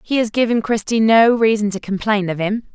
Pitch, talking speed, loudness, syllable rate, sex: 215 Hz, 220 wpm, -17 LUFS, 5.4 syllables/s, female